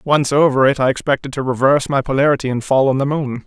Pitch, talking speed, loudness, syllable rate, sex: 135 Hz, 240 wpm, -16 LUFS, 6.5 syllables/s, male